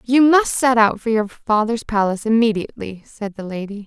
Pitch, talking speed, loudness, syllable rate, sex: 220 Hz, 185 wpm, -18 LUFS, 5.4 syllables/s, female